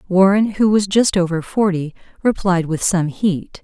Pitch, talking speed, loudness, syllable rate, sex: 185 Hz, 165 wpm, -17 LUFS, 4.4 syllables/s, female